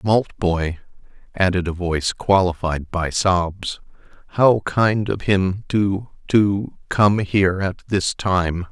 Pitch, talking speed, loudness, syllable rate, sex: 95 Hz, 110 wpm, -20 LUFS, 3.3 syllables/s, male